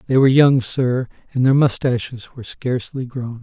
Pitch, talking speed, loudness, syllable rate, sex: 125 Hz, 175 wpm, -18 LUFS, 5.5 syllables/s, male